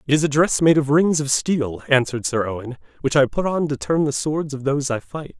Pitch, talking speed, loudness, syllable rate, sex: 140 Hz, 265 wpm, -20 LUFS, 5.7 syllables/s, male